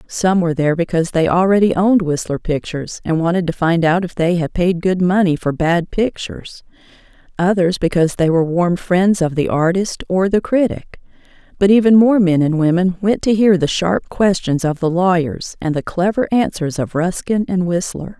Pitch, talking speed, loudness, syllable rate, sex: 180 Hz, 190 wpm, -16 LUFS, 5.2 syllables/s, female